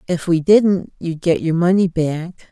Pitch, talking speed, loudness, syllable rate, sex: 175 Hz, 190 wpm, -17 LUFS, 4.0 syllables/s, female